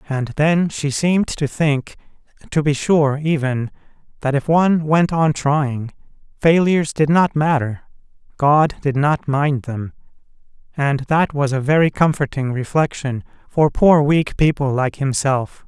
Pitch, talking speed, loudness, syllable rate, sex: 145 Hz, 140 wpm, -18 LUFS, 4.1 syllables/s, male